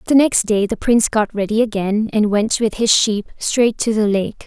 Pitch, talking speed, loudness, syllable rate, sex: 215 Hz, 230 wpm, -17 LUFS, 4.9 syllables/s, female